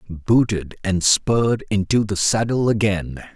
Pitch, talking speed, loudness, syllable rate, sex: 105 Hz, 125 wpm, -19 LUFS, 4.0 syllables/s, male